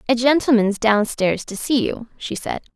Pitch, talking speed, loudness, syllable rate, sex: 235 Hz, 175 wpm, -19 LUFS, 4.6 syllables/s, female